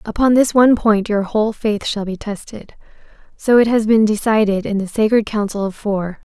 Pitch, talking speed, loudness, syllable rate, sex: 215 Hz, 190 wpm, -16 LUFS, 5.2 syllables/s, female